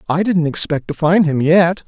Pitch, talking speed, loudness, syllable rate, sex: 165 Hz, 225 wpm, -15 LUFS, 4.7 syllables/s, male